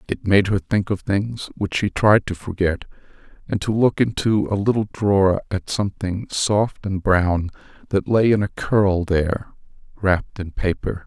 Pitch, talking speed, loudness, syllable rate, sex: 100 Hz, 175 wpm, -20 LUFS, 4.5 syllables/s, male